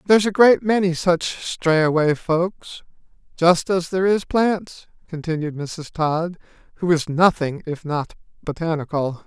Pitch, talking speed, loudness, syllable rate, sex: 170 Hz, 135 wpm, -20 LUFS, 4.1 syllables/s, male